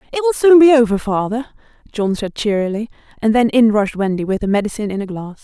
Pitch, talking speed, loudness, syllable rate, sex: 225 Hz, 220 wpm, -16 LUFS, 7.1 syllables/s, female